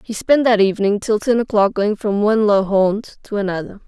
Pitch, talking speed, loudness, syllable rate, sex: 210 Hz, 215 wpm, -17 LUFS, 5.4 syllables/s, female